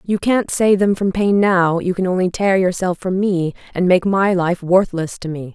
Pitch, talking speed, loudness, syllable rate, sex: 185 Hz, 225 wpm, -17 LUFS, 4.6 syllables/s, female